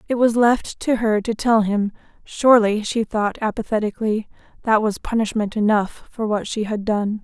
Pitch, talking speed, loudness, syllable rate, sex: 215 Hz, 175 wpm, -20 LUFS, 4.9 syllables/s, female